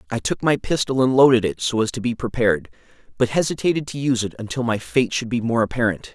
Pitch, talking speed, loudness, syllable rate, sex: 120 Hz, 235 wpm, -20 LUFS, 6.4 syllables/s, male